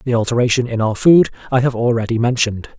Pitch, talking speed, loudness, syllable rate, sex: 120 Hz, 195 wpm, -16 LUFS, 6.8 syllables/s, male